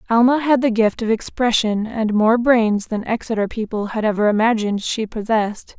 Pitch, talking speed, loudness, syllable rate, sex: 220 Hz, 175 wpm, -18 LUFS, 5.2 syllables/s, female